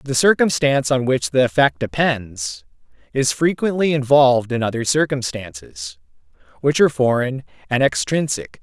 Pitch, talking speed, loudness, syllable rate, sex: 125 Hz, 125 wpm, -18 LUFS, 4.8 syllables/s, male